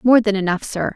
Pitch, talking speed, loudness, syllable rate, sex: 210 Hz, 250 wpm, -18 LUFS, 5.9 syllables/s, female